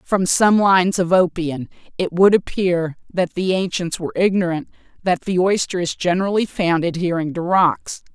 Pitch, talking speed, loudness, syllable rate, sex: 180 Hz, 160 wpm, -18 LUFS, 4.9 syllables/s, female